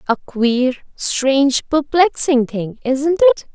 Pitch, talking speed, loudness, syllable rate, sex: 275 Hz, 120 wpm, -16 LUFS, 3.4 syllables/s, female